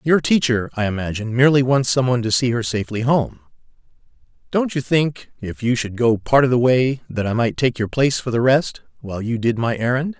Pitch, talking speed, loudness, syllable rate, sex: 125 Hz, 225 wpm, -19 LUFS, 5.8 syllables/s, male